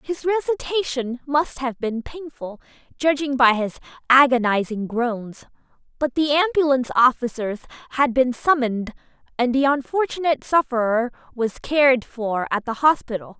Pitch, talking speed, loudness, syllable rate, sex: 260 Hz, 125 wpm, -21 LUFS, 4.9 syllables/s, female